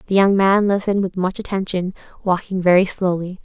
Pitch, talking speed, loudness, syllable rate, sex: 190 Hz, 175 wpm, -18 LUFS, 5.7 syllables/s, female